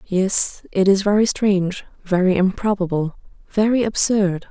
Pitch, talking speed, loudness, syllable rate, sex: 195 Hz, 120 wpm, -19 LUFS, 4.5 syllables/s, female